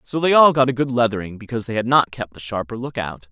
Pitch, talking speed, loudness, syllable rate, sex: 120 Hz, 290 wpm, -19 LUFS, 6.5 syllables/s, male